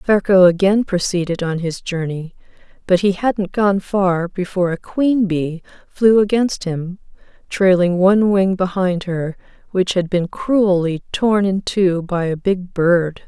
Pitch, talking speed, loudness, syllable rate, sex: 185 Hz, 155 wpm, -17 LUFS, 4.0 syllables/s, female